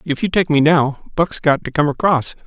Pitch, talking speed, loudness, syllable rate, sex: 155 Hz, 245 wpm, -17 LUFS, 5.1 syllables/s, male